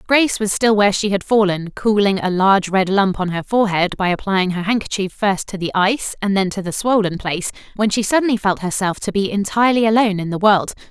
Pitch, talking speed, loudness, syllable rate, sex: 200 Hz, 225 wpm, -17 LUFS, 6.1 syllables/s, female